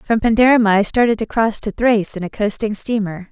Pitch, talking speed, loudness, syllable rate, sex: 215 Hz, 215 wpm, -17 LUFS, 5.7 syllables/s, female